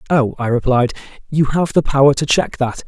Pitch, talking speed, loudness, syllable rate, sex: 135 Hz, 210 wpm, -16 LUFS, 5.4 syllables/s, male